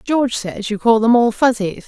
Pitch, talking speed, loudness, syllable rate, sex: 230 Hz, 225 wpm, -16 LUFS, 5.3 syllables/s, female